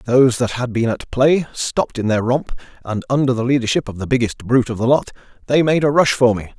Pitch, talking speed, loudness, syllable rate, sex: 125 Hz, 245 wpm, -17 LUFS, 6.0 syllables/s, male